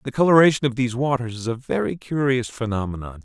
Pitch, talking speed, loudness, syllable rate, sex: 125 Hz, 185 wpm, -21 LUFS, 6.5 syllables/s, male